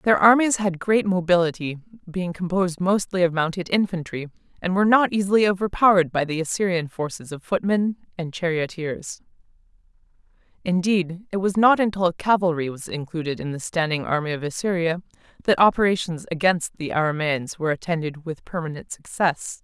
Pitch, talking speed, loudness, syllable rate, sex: 175 Hz, 145 wpm, -22 LUFS, 5.5 syllables/s, female